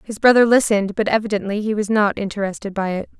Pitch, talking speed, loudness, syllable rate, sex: 210 Hz, 205 wpm, -18 LUFS, 6.6 syllables/s, female